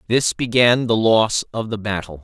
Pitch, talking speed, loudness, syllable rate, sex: 110 Hz, 190 wpm, -18 LUFS, 4.6 syllables/s, male